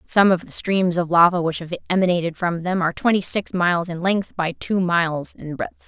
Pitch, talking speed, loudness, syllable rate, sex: 175 Hz, 225 wpm, -20 LUFS, 5.4 syllables/s, female